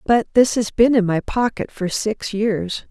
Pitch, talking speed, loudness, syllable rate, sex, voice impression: 215 Hz, 205 wpm, -19 LUFS, 4.1 syllables/s, female, very feminine, slightly young, slightly adult-like, thin, slightly tensed, slightly powerful, slightly bright, hard, clear, fluent, slightly cute, slightly cool, intellectual, slightly refreshing, sincere, slightly calm, slightly friendly, slightly reassuring, slightly elegant, slightly sweet, slightly lively, slightly strict